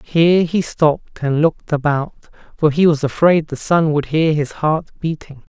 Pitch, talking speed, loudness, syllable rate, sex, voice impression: 155 Hz, 185 wpm, -17 LUFS, 4.8 syllables/s, male, masculine, adult-like, slightly soft, friendly, reassuring, kind